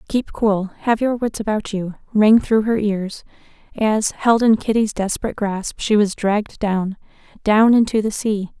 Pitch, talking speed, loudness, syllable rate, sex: 210 Hz, 175 wpm, -18 LUFS, 4.5 syllables/s, female